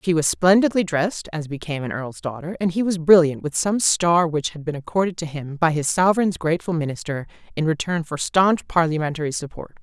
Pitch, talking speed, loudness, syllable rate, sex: 165 Hz, 200 wpm, -21 LUFS, 5.8 syllables/s, female